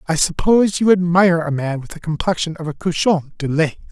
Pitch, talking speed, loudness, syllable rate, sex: 170 Hz, 215 wpm, -18 LUFS, 6.1 syllables/s, male